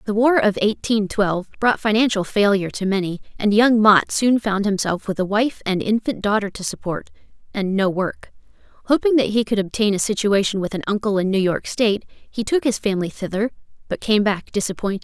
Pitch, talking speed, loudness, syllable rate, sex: 205 Hz, 200 wpm, -20 LUFS, 5.5 syllables/s, female